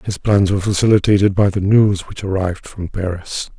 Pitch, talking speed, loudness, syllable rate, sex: 100 Hz, 185 wpm, -16 LUFS, 5.6 syllables/s, male